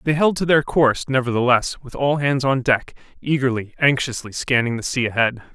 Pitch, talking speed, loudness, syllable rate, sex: 130 Hz, 185 wpm, -19 LUFS, 5.5 syllables/s, male